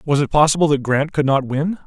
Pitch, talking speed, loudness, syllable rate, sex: 145 Hz, 260 wpm, -17 LUFS, 6.0 syllables/s, male